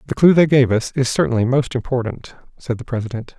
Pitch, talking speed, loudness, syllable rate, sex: 125 Hz, 210 wpm, -18 LUFS, 6.1 syllables/s, male